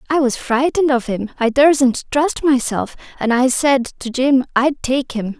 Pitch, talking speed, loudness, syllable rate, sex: 260 Hz, 190 wpm, -17 LUFS, 4.4 syllables/s, female